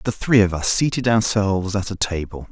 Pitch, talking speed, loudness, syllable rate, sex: 100 Hz, 215 wpm, -19 LUFS, 5.4 syllables/s, male